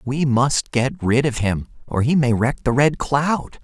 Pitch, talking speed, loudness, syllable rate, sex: 130 Hz, 215 wpm, -19 LUFS, 4.0 syllables/s, male